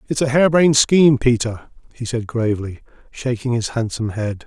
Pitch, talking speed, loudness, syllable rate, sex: 125 Hz, 160 wpm, -18 LUFS, 5.9 syllables/s, male